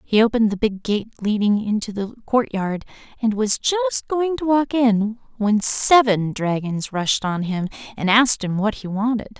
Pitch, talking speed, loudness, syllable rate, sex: 220 Hz, 180 wpm, -20 LUFS, 4.6 syllables/s, female